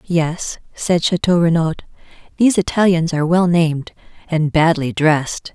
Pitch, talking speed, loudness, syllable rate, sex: 165 Hz, 130 wpm, -17 LUFS, 4.8 syllables/s, female